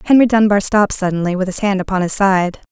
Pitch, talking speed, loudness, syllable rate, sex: 195 Hz, 220 wpm, -15 LUFS, 6.4 syllables/s, female